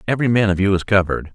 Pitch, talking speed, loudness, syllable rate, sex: 100 Hz, 270 wpm, -17 LUFS, 8.3 syllables/s, male